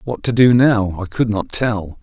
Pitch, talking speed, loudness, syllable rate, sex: 110 Hz, 235 wpm, -16 LUFS, 4.2 syllables/s, male